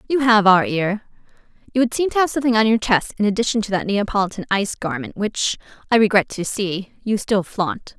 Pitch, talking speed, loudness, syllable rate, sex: 210 Hz, 210 wpm, -19 LUFS, 5.7 syllables/s, female